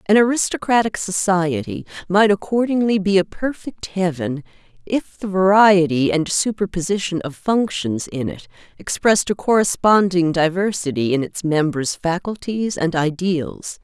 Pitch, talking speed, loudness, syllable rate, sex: 180 Hz, 120 wpm, -19 LUFS, 4.6 syllables/s, female